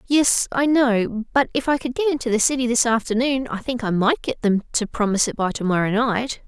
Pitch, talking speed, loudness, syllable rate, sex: 240 Hz, 240 wpm, -20 LUFS, 5.5 syllables/s, female